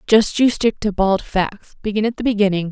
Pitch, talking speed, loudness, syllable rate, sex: 205 Hz, 220 wpm, -18 LUFS, 5.3 syllables/s, female